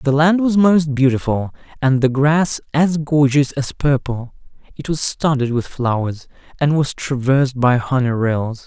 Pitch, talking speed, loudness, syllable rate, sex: 135 Hz, 160 wpm, -17 LUFS, 4.3 syllables/s, male